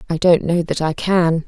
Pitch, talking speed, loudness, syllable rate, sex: 170 Hz, 245 wpm, -17 LUFS, 4.7 syllables/s, female